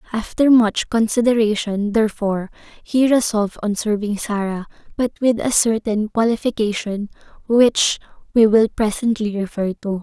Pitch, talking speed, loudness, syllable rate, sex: 220 Hz, 120 wpm, -18 LUFS, 4.8 syllables/s, female